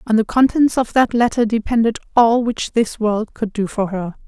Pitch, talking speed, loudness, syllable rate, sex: 225 Hz, 210 wpm, -17 LUFS, 4.9 syllables/s, female